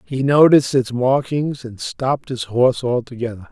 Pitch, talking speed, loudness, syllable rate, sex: 130 Hz, 155 wpm, -18 LUFS, 5.1 syllables/s, male